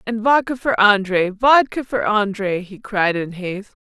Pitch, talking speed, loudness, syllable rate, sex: 210 Hz, 170 wpm, -18 LUFS, 4.4 syllables/s, female